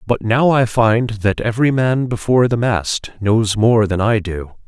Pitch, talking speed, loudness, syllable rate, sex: 110 Hz, 190 wpm, -16 LUFS, 4.3 syllables/s, male